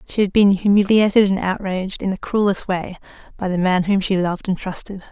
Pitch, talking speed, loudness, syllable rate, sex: 190 Hz, 210 wpm, -19 LUFS, 5.8 syllables/s, female